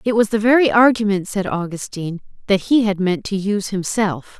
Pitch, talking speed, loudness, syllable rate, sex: 200 Hz, 190 wpm, -18 LUFS, 5.5 syllables/s, female